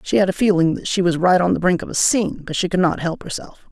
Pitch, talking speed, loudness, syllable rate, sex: 175 Hz, 325 wpm, -18 LUFS, 6.4 syllables/s, female